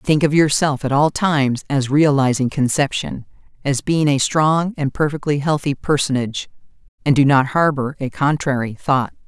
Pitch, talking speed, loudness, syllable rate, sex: 140 Hz, 155 wpm, -18 LUFS, 4.8 syllables/s, female